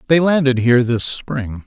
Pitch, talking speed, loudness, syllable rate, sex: 130 Hz, 180 wpm, -16 LUFS, 4.8 syllables/s, male